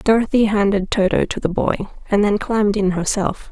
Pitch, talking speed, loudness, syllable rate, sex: 205 Hz, 190 wpm, -18 LUFS, 5.4 syllables/s, female